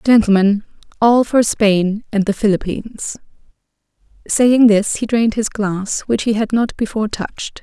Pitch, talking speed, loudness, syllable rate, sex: 215 Hz, 150 wpm, -16 LUFS, 4.7 syllables/s, female